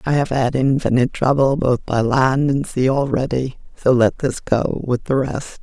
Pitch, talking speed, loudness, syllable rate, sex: 130 Hz, 190 wpm, -18 LUFS, 4.6 syllables/s, female